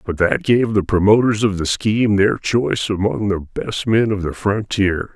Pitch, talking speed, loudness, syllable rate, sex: 105 Hz, 200 wpm, -17 LUFS, 4.7 syllables/s, male